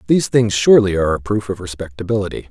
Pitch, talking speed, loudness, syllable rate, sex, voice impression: 105 Hz, 190 wpm, -16 LUFS, 7.4 syllables/s, male, masculine, adult-like, slightly thick, fluent, cool, intellectual, sincere, calm, elegant, slightly sweet